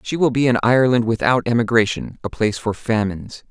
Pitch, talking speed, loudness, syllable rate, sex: 115 Hz, 190 wpm, -18 LUFS, 6.1 syllables/s, male